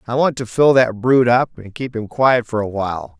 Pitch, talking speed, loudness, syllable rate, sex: 120 Hz, 265 wpm, -17 LUFS, 5.3 syllables/s, male